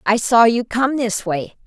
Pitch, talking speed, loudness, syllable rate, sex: 230 Hz, 215 wpm, -17 LUFS, 4.1 syllables/s, female